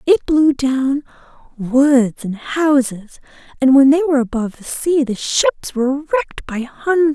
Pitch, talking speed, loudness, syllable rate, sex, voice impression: 275 Hz, 160 wpm, -16 LUFS, 4.3 syllables/s, female, very feminine, very adult-like, middle-aged, very thin, relaxed, slightly powerful, bright, very soft, very clear, very fluent, very cute, very intellectual, very refreshing, very sincere, very calm, very friendly, very reassuring, unique, very elegant, very sweet, very lively, kind, slightly modest